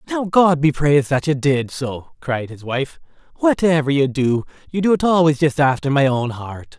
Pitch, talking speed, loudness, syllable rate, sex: 145 Hz, 205 wpm, -18 LUFS, 4.8 syllables/s, male